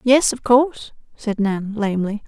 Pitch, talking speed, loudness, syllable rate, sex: 225 Hz, 160 wpm, -19 LUFS, 4.7 syllables/s, female